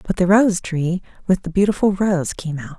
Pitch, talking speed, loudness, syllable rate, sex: 180 Hz, 215 wpm, -19 LUFS, 4.9 syllables/s, female